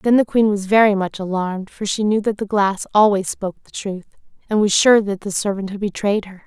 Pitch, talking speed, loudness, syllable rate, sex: 200 Hz, 240 wpm, -18 LUFS, 5.5 syllables/s, female